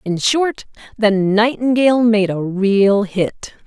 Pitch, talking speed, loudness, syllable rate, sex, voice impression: 215 Hz, 130 wpm, -16 LUFS, 3.6 syllables/s, female, very feminine, adult-like, very thin, tensed, powerful, slightly bright, slightly hard, clear, fluent, cool, intellectual, slightly refreshing, sincere, slightly calm, slightly friendly, slightly reassuring, very unique, slightly elegant, slightly wild, slightly sweet, slightly lively, slightly strict, intense